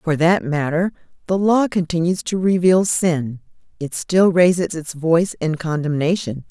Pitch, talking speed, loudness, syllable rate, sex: 170 Hz, 140 wpm, -18 LUFS, 4.5 syllables/s, female